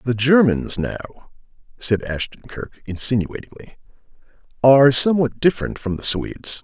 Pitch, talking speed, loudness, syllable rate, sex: 125 Hz, 115 wpm, -18 LUFS, 5.2 syllables/s, male